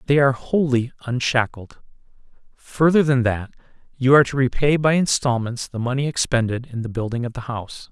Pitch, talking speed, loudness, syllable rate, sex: 130 Hz, 165 wpm, -20 LUFS, 5.6 syllables/s, male